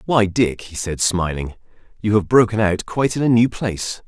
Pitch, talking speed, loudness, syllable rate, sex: 105 Hz, 205 wpm, -19 LUFS, 5.2 syllables/s, male